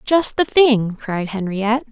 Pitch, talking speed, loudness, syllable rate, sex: 230 Hz, 155 wpm, -18 LUFS, 4.1 syllables/s, female